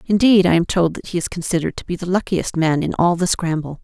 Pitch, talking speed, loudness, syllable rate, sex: 175 Hz, 265 wpm, -18 LUFS, 6.2 syllables/s, female